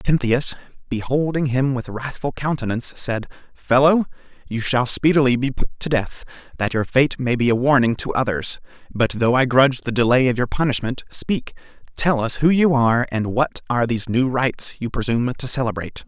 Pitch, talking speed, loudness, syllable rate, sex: 125 Hz, 185 wpm, -20 LUFS, 5.5 syllables/s, male